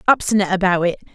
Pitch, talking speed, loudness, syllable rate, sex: 195 Hz, 155 wpm, -18 LUFS, 8.2 syllables/s, female